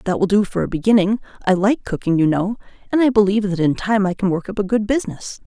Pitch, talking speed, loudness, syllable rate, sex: 200 Hz, 260 wpm, -18 LUFS, 6.6 syllables/s, female